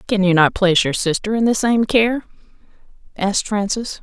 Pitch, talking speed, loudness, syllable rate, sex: 205 Hz, 180 wpm, -17 LUFS, 5.4 syllables/s, female